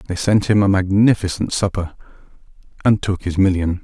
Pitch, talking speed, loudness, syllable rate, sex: 95 Hz, 155 wpm, -17 LUFS, 5.4 syllables/s, male